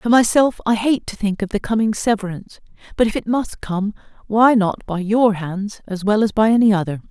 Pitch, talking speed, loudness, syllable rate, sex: 210 Hz, 220 wpm, -18 LUFS, 5.3 syllables/s, female